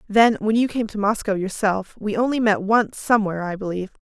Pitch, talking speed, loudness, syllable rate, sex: 210 Hz, 210 wpm, -21 LUFS, 6.0 syllables/s, female